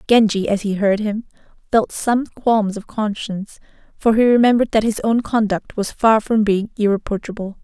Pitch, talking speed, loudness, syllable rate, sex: 215 Hz, 175 wpm, -18 LUFS, 5.0 syllables/s, female